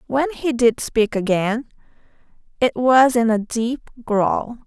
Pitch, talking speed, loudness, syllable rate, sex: 240 Hz, 140 wpm, -19 LUFS, 3.6 syllables/s, female